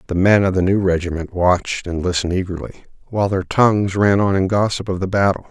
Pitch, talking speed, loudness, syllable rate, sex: 95 Hz, 220 wpm, -18 LUFS, 6.2 syllables/s, male